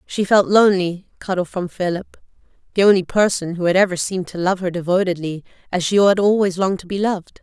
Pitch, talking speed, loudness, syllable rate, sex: 185 Hz, 200 wpm, -18 LUFS, 6.1 syllables/s, female